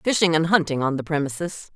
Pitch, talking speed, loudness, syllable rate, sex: 160 Hz, 205 wpm, -22 LUFS, 6.0 syllables/s, female